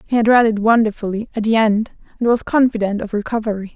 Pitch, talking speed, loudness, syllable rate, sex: 220 Hz, 190 wpm, -17 LUFS, 6.3 syllables/s, female